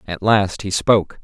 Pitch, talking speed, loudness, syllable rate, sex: 100 Hz, 195 wpm, -18 LUFS, 4.7 syllables/s, male